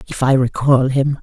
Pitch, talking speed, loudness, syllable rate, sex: 130 Hz, 195 wpm, -15 LUFS, 4.7 syllables/s, female